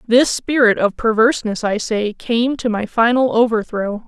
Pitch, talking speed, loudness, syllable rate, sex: 230 Hz, 160 wpm, -17 LUFS, 4.6 syllables/s, female